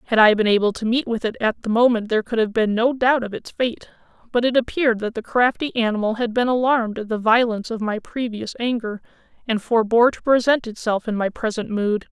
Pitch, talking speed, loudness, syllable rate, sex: 230 Hz, 225 wpm, -20 LUFS, 5.9 syllables/s, female